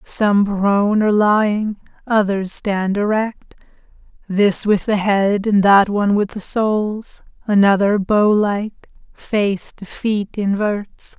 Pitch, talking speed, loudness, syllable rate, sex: 205 Hz, 130 wpm, -17 LUFS, 3.6 syllables/s, female